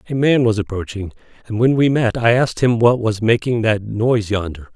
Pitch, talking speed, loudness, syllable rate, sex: 115 Hz, 215 wpm, -17 LUFS, 5.5 syllables/s, male